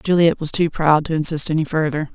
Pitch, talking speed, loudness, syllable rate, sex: 155 Hz, 225 wpm, -18 LUFS, 6.4 syllables/s, female